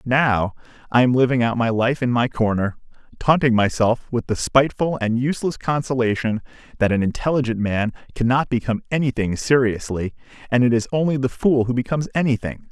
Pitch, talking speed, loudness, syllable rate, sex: 125 Hz, 165 wpm, -20 LUFS, 5.7 syllables/s, male